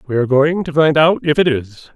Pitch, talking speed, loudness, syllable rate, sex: 150 Hz, 275 wpm, -14 LUFS, 5.7 syllables/s, male